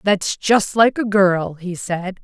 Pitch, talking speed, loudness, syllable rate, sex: 190 Hz, 190 wpm, -18 LUFS, 3.3 syllables/s, female